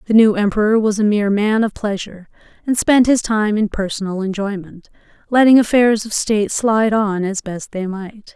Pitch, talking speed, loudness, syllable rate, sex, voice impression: 210 Hz, 185 wpm, -16 LUFS, 5.3 syllables/s, female, feminine, adult-like, powerful, fluent, raspy, intellectual, calm, friendly, lively, strict, sharp